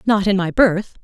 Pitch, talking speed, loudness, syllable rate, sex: 200 Hz, 230 wpm, -17 LUFS, 4.4 syllables/s, female